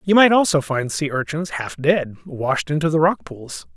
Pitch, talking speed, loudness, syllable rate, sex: 155 Hz, 205 wpm, -19 LUFS, 4.6 syllables/s, male